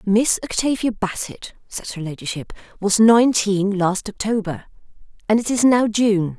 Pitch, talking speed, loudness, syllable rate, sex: 205 Hz, 140 wpm, -19 LUFS, 4.5 syllables/s, female